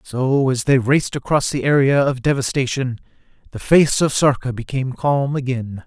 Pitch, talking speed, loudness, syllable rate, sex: 130 Hz, 165 wpm, -18 LUFS, 5.0 syllables/s, male